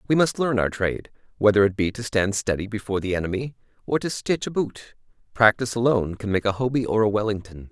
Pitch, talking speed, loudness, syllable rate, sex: 110 Hz, 220 wpm, -23 LUFS, 6.4 syllables/s, male